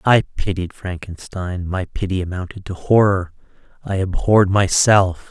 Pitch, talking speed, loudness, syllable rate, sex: 95 Hz, 125 wpm, -18 LUFS, 4.5 syllables/s, male